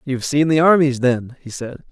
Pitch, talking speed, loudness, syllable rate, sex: 135 Hz, 220 wpm, -16 LUFS, 5.2 syllables/s, male